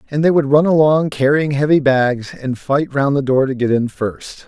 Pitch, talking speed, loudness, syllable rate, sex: 140 Hz, 230 wpm, -16 LUFS, 4.9 syllables/s, male